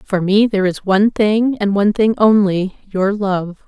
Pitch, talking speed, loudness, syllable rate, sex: 200 Hz, 180 wpm, -15 LUFS, 4.6 syllables/s, female